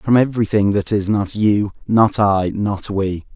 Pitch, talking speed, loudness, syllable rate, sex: 105 Hz, 180 wpm, -17 LUFS, 4.2 syllables/s, male